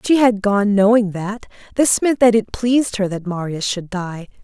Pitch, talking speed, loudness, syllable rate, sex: 210 Hz, 205 wpm, -17 LUFS, 4.6 syllables/s, female